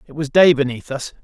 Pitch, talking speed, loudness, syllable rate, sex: 145 Hz, 240 wpm, -16 LUFS, 5.8 syllables/s, male